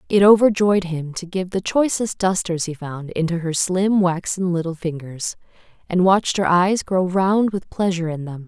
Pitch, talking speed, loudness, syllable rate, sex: 180 Hz, 185 wpm, -20 LUFS, 4.6 syllables/s, female